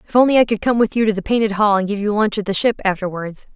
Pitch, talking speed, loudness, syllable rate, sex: 210 Hz, 320 wpm, -17 LUFS, 6.9 syllables/s, female